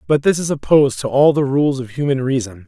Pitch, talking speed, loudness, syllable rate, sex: 135 Hz, 245 wpm, -16 LUFS, 6.0 syllables/s, male